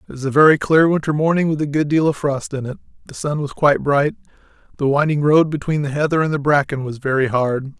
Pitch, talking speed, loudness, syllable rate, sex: 145 Hz, 245 wpm, -18 LUFS, 6.1 syllables/s, male